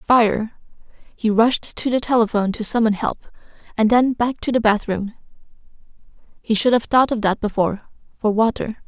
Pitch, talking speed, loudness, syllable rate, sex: 225 Hz, 150 wpm, -19 LUFS, 5.2 syllables/s, female